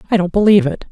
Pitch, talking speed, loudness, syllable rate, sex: 190 Hz, 260 wpm, -13 LUFS, 9.0 syllables/s, female